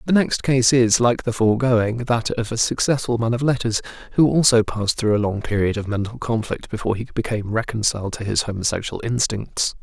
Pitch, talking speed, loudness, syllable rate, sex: 115 Hz, 195 wpm, -20 LUFS, 5.8 syllables/s, male